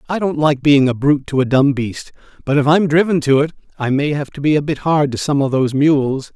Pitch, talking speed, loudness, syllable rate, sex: 145 Hz, 275 wpm, -16 LUFS, 5.8 syllables/s, male